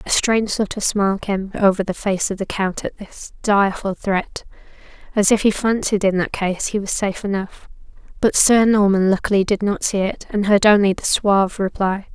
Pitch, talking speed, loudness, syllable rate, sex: 200 Hz, 205 wpm, -18 LUFS, 5.3 syllables/s, female